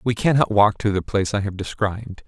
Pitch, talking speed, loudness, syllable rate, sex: 105 Hz, 235 wpm, -20 LUFS, 6.0 syllables/s, male